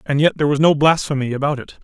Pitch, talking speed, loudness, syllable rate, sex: 145 Hz, 260 wpm, -17 LUFS, 7.2 syllables/s, male